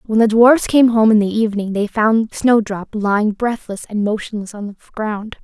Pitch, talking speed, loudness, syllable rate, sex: 215 Hz, 200 wpm, -16 LUFS, 4.9 syllables/s, female